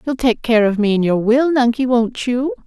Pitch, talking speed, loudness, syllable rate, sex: 235 Hz, 250 wpm, -16 LUFS, 4.9 syllables/s, female